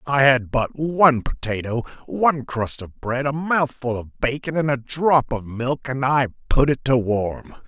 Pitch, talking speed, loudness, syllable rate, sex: 130 Hz, 190 wpm, -21 LUFS, 4.3 syllables/s, male